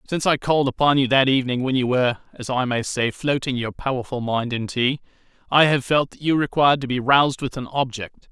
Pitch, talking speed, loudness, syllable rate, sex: 130 Hz, 230 wpm, -21 LUFS, 6.0 syllables/s, male